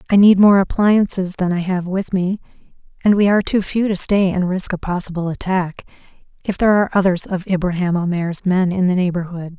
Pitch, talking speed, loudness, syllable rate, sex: 185 Hz, 200 wpm, -17 LUFS, 5.7 syllables/s, female